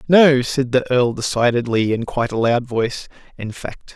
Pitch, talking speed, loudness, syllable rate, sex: 125 Hz, 165 wpm, -18 LUFS, 5.0 syllables/s, male